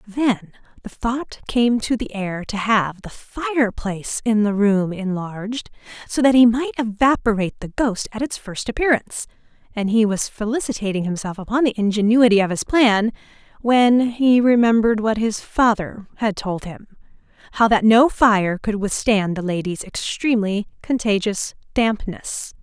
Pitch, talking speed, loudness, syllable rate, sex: 220 Hz, 150 wpm, -19 LUFS, 4.7 syllables/s, female